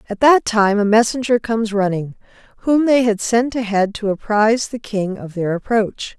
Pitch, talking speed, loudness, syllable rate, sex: 220 Hz, 185 wpm, -17 LUFS, 4.9 syllables/s, female